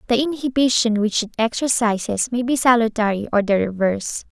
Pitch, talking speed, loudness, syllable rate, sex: 230 Hz, 150 wpm, -19 LUFS, 5.5 syllables/s, female